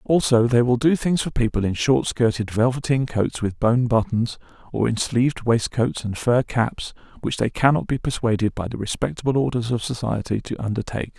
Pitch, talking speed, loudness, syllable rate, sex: 120 Hz, 190 wpm, -22 LUFS, 5.3 syllables/s, male